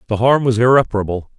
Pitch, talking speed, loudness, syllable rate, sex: 115 Hz, 175 wpm, -15 LUFS, 7.0 syllables/s, male